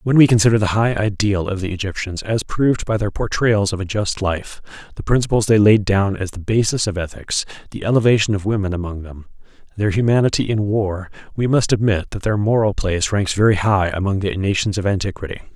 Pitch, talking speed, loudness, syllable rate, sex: 105 Hz, 205 wpm, -18 LUFS, 5.8 syllables/s, male